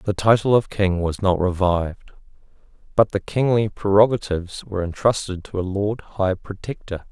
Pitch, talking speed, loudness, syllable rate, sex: 100 Hz, 150 wpm, -21 LUFS, 5.0 syllables/s, male